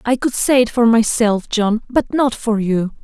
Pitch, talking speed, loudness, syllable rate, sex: 230 Hz, 215 wpm, -16 LUFS, 4.3 syllables/s, female